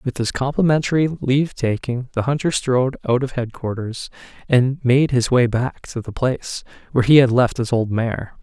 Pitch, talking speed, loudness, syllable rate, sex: 125 Hz, 190 wpm, -19 LUFS, 5.1 syllables/s, male